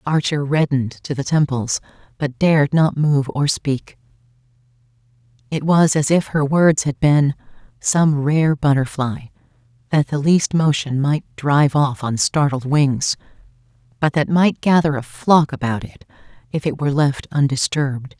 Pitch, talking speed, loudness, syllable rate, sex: 140 Hz, 150 wpm, -18 LUFS, 4.4 syllables/s, female